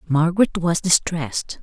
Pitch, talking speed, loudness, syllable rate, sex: 165 Hz, 110 wpm, -19 LUFS, 4.8 syllables/s, female